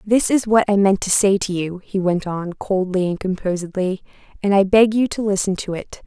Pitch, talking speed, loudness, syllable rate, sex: 195 Hz, 230 wpm, -19 LUFS, 5.2 syllables/s, female